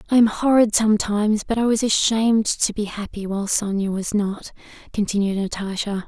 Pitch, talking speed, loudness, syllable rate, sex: 210 Hz, 170 wpm, -20 LUFS, 5.6 syllables/s, female